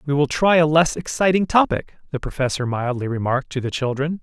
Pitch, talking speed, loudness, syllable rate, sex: 145 Hz, 200 wpm, -20 LUFS, 5.8 syllables/s, male